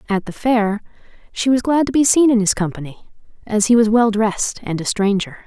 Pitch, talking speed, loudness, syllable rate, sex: 220 Hz, 220 wpm, -17 LUFS, 5.5 syllables/s, female